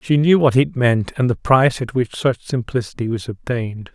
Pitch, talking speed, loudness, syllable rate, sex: 125 Hz, 215 wpm, -18 LUFS, 5.3 syllables/s, male